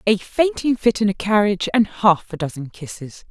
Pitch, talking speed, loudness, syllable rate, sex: 205 Hz, 200 wpm, -19 LUFS, 5.1 syllables/s, female